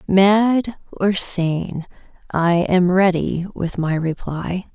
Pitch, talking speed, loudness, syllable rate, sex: 185 Hz, 115 wpm, -19 LUFS, 2.9 syllables/s, female